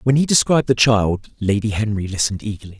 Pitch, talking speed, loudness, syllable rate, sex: 110 Hz, 195 wpm, -18 LUFS, 6.5 syllables/s, male